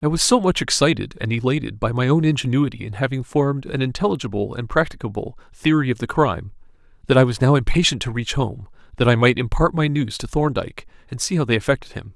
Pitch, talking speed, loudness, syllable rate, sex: 130 Hz, 215 wpm, -20 LUFS, 6.4 syllables/s, male